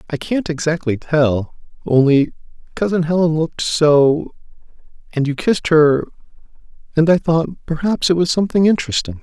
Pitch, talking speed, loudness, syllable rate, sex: 160 Hz, 115 wpm, -16 LUFS, 5.1 syllables/s, male